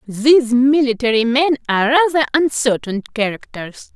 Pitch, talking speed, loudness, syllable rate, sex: 255 Hz, 105 wpm, -15 LUFS, 5.1 syllables/s, female